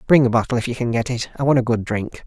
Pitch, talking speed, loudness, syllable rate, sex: 120 Hz, 320 wpm, -20 LUFS, 6.7 syllables/s, male